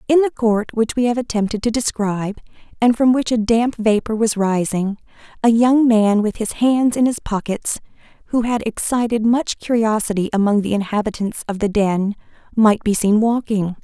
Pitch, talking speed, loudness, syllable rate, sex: 220 Hz, 180 wpm, -18 LUFS, 5.0 syllables/s, female